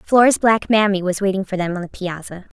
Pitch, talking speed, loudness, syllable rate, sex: 195 Hz, 230 wpm, -18 LUFS, 5.9 syllables/s, female